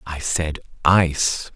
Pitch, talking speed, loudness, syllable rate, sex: 80 Hz, 115 wpm, -20 LUFS, 3.4 syllables/s, male